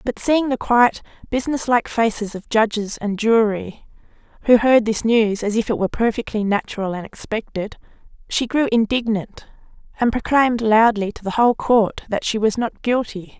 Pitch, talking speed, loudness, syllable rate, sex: 225 Hz, 170 wpm, -19 LUFS, 5.0 syllables/s, female